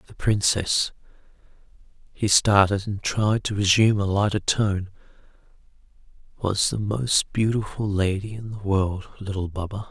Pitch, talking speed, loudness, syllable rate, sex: 100 Hz, 115 wpm, -23 LUFS, 4.7 syllables/s, male